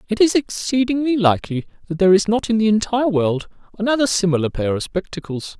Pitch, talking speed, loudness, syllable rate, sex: 205 Hz, 180 wpm, -19 LUFS, 6.3 syllables/s, male